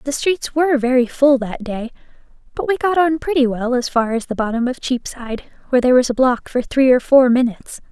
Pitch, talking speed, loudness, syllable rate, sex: 260 Hz, 225 wpm, -17 LUFS, 5.8 syllables/s, female